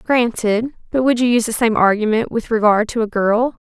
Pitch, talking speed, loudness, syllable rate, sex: 225 Hz, 200 wpm, -17 LUFS, 5.6 syllables/s, female